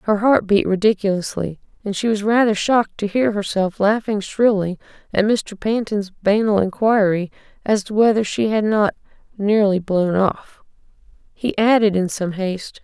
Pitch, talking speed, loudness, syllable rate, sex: 205 Hz, 155 wpm, -19 LUFS, 4.7 syllables/s, female